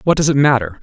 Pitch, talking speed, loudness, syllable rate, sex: 135 Hz, 290 wpm, -14 LUFS, 6.9 syllables/s, male